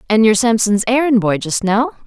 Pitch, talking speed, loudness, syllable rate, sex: 220 Hz, 205 wpm, -15 LUFS, 5.8 syllables/s, female